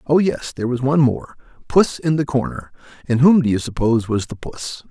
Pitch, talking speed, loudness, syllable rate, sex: 130 Hz, 220 wpm, -18 LUFS, 5.7 syllables/s, male